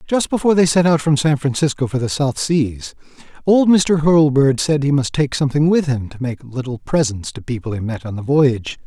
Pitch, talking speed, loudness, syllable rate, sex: 140 Hz, 225 wpm, -17 LUFS, 5.4 syllables/s, male